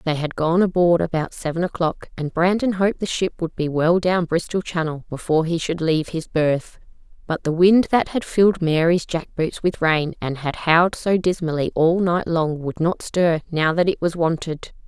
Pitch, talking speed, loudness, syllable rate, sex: 170 Hz, 205 wpm, -20 LUFS, 4.9 syllables/s, female